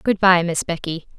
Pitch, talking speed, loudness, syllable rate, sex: 175 Hz, 205 wpm, -19 LUFS, 5.1 syllables/s, female